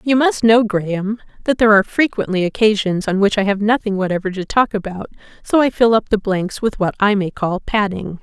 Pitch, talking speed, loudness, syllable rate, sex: 210 Hz, 220 wpm, -17 LUFS, 5.6 syllables/s, female